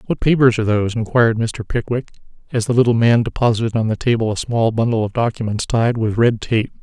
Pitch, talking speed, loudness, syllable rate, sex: 115 Hz, 210 wpm, -17 LUFS, 6.2 syllables/s, male